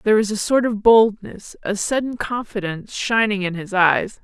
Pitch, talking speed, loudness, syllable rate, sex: 210 Hz, 185 wpm, -19 LUFS, 4.8 syllables/s, female